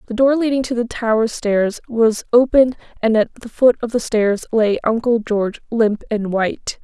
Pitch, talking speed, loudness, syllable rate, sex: 225 Hz, 195 wpm, -17 LUFS, 4.7 syllables/s, female